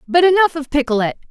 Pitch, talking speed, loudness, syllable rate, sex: 295 Hz, 185 wpm, -16 LUFS, 6.5 syllables/s, female